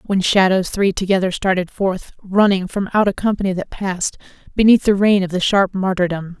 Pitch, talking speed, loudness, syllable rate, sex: 190 Hz, 190 wpm, -17 LUFS, 5.4 syllables/s, female